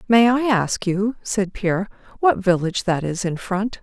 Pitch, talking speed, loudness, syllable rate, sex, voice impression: 200 Hz, 190 wpm, -20 LUFS, 4.6 syllables/s, female, feminine, adult-like, tensed, slightly hard, slightly muffled, fluent, intellectual, calm, friendly, reassuring, elegant, kind, modest